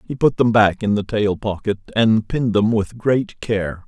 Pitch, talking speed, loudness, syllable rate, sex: 110 Hz, 215 wpm, -19 LUFS, 4.5 syllables/s, male